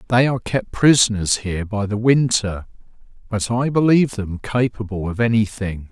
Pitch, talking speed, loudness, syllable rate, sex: 110 Hz, 150 wpm, -19 LUFS, 5.2 syllables/s, male